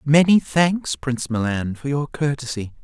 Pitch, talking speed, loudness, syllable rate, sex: 135 Hz, 150 wpm, -21 LUFS, 4.5 syllables/s, male